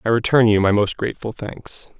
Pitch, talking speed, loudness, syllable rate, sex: 110 Hz, 210 wpm, -18 LUFS, 5.4 syllables/s, male